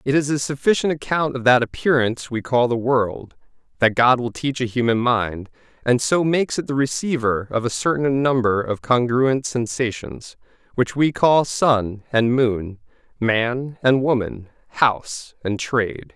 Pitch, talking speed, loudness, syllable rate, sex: 125 Hz, 165 wpm, -20 LUFS, 4.4 syllables/s, male